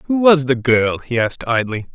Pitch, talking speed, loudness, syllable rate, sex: 135 Hz, 215 wpm, -16 LUFS, 4.9 syllables/s, male